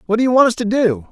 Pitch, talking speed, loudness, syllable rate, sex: 220 Hz, 375 wpm, -15 LUFS, 7.2 syllables/s, male